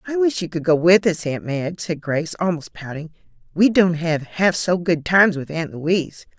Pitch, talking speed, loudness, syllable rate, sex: 170 Hz, 215 wpm, -19 LUFS, 5.1 syllables/s, female